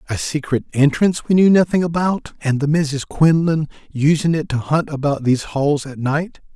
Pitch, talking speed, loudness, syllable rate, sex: 150 Hz, 185 wpm, -18 LUFS, 5.1 syllables/s, male